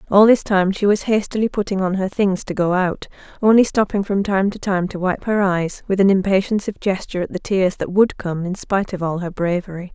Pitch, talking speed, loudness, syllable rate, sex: 195 Hz, 240 wpm, -19 LUFS, 5.7 syllables/s, female